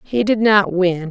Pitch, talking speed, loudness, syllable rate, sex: 200 Hz, 215 wpm, -16 LUFS, 4.0 syllables/s, female